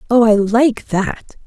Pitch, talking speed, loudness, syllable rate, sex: 225 Hz, 165 wpm, -15 LUFS, 3.7 syllables/s, female